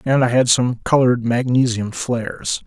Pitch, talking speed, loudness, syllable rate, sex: 120 Hz, 160 wpm, -18 LUFS, 4.7 syllables/s, male